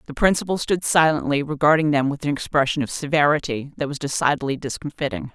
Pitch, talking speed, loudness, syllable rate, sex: 145 Hz, 170 wpm, -21 LUFS, 6.3 syllables/s, female